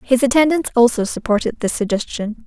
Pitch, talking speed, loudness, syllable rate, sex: 240 Hz, 145 wpm, -17 LUFS, 5.4 syllables/s, female